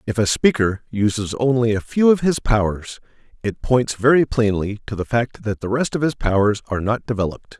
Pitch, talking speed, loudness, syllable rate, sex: 115 Hz, 205 wpm, -19 LUFS, 5.4 syllables/s, male